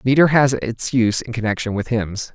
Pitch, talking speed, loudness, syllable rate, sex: 115 Hz, 205 wpm, -19 LUFS, 5.3 syllables/s, male